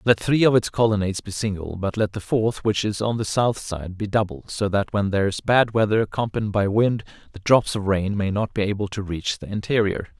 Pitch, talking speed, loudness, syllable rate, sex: 105 Hz, 240 wpm, -22 LUFS, 5.6 syllables/s, male